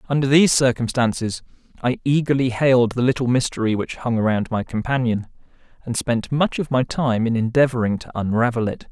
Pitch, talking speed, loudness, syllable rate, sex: 125 Hz, 170 wpm, -20 LUFS, 5.7 syllables/s, male